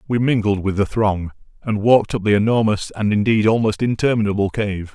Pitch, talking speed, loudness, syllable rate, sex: 105 Hz, 180 wpm, -18 LUFS, 5.6 syllables/s, male